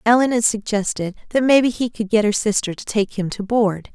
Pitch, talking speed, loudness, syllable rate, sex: 215 Hz, 230 wpm, -19 LUFS, 5.4 syllables/s, female